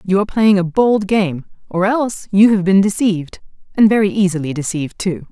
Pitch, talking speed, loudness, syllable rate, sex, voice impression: 190 Hz, 190 wpm, -15 LUFS, 5.6 syllables/s, female, very feminine, adult-like, slightly middle-aged, thin, slightly tensed, slightly weak, slightly dark, hard, slightly muffled, slightly fluent, cool, intellectual, slightly refreshing, sincere, very calm, slightly unique, elegant, slightly sweet, lively, very kind, modest, slightly light